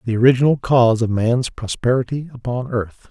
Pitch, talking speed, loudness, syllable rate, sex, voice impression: 120 Hz, 155 wpm, -18 LUFS, 5.5 syllables/s, male, very masculine, very adult-like, old, thick, very relaxed, very weak, dark, very soft, muffled, slightly halting, very raspy, very cool, intellectual, sincere, very calm, friendly, reassuring, very unique, elegant, very wild, sweet, slightly lively, very kind, modest, slightly light